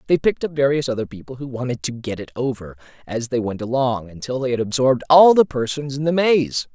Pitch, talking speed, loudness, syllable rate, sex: 130 Hz, 230 wpm, -20 LUFS, 6.0 syllables/s, male